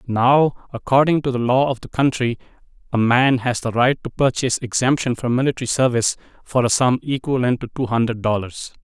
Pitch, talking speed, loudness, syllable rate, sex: 125 Hz, 185 wpm, -19 LUFS, 5.8 syllables/s, male